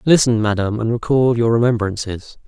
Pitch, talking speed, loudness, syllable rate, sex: 115 Hz, 145 wpm, -17 LUFS, 5.7 syllables/s, male